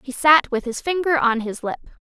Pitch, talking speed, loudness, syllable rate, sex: 270 Hz, 235 wpm, -19 LUFS, 5.5 syllables/s, female